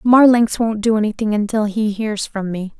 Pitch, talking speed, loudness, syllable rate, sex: 215 Hz, 195 wpm, -17 LUFS, 4.9 syllables/s, female